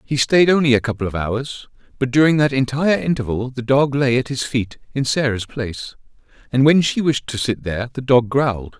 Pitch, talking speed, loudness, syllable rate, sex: 130 Hz, 210 wpm, -18 LUFS, 5.5 syllables/s, male